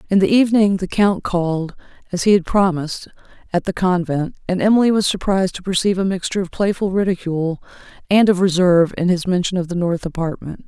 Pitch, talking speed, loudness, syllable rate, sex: 185 Hz, 190 wpm, -18 LUFS, 6.3 syllables/s, female